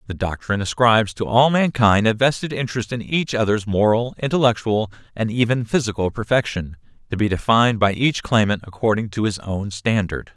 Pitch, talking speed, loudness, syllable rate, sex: 110 Hz, 170 wpm, -20 LUFS, 5.6 syllables/s, male